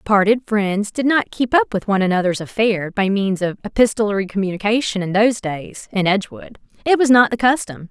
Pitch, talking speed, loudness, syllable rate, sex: 210 Hz, 190 wpm, -18 LUFS, 5.7 syllables/s, female